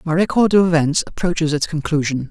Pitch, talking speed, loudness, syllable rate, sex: 160 Hz, 180 wpm, -17 LUFS, 6.0 syllables/s, male